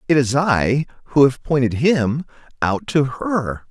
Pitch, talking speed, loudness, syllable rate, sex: 135 Hz, 160 wpm, -19 LUFS, 3.9 syllables/s, male